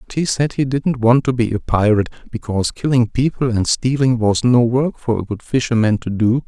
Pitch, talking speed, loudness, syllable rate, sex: 120 Hz, 220 wpm, -17 LUFS, 5.4 syllables/s, male